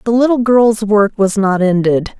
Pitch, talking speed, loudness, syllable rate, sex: 210 Hz, 190 wpm, -12 LUFS, 4.5 syllables/s, female